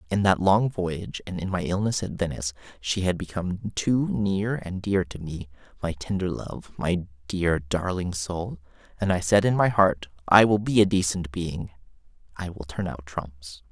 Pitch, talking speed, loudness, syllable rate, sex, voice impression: 90 Hz, 190 wpm, -25 LUFS, 4.5 syllables/s, male, masculine, middle-aged, relaxed, slightly weak, raspy, intellectual, slightly sincere, friendly, unique, slightly kind, modest